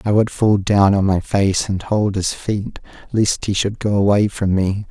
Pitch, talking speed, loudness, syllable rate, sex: 100 Hz, 220 wpm, -18 LUFS, 4.3 syllables/s, male